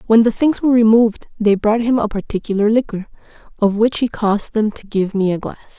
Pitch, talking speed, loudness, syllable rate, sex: 220 Hz, 220 wpm, -16 LUFS, 5.9 syllables/s, female